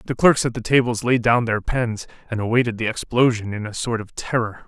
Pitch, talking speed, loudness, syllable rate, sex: 115 Hz, 230 wpm, -21 LUFS, 5.6 syllables/s, male